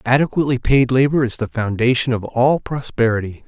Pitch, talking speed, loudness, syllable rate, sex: 125 Hz, 155 wpm, -18 LUFS, 5.7 syllables/s, male